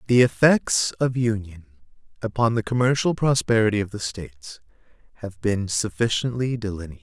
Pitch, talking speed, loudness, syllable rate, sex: 110 Hz, 130 wpm, -22 LUFS, 5.2 syllables/s, male